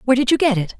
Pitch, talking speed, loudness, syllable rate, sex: 245 Hz, 375 wpm, -17 LUFS, 9.0 syllables/s, female